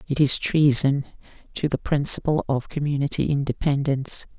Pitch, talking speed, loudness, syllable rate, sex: 140 Hz, 125 wpm, -22 LUFS, 5.3 syllables/s, female